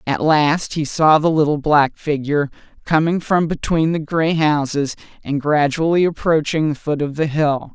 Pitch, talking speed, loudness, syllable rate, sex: 155 Hz, 170 wpm, -18 LUFS, 4.6 syllables/s, female